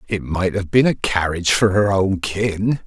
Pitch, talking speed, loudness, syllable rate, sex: 100 Hz, 210 wpm, -18 LUFS, 4.4 syllables/s, male